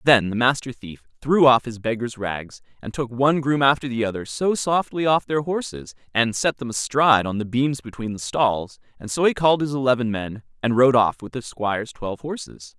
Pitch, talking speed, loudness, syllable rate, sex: 125 Hz, 215 wpm, -21 LUFS, 5.3 syllables/s, male